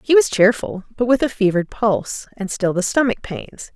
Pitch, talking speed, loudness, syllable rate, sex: 215 Hz, 210 wpm, -19 LUFS, 5.1 syllables/s, female